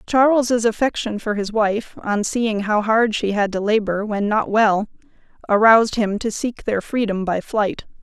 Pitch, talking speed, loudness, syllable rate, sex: 215 Hz, 180 wpm, -19 LUFS, 4.4 syllables/s, female